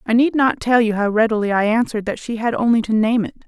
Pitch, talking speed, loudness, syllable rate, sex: 225 Hz, 275 wpm, -18 LUFS, 6.5 syllables/s, female